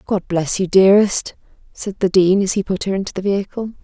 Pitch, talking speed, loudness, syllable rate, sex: 190 Hz, 220 wpm, -17 LUFS, 5.8 syllables/s, female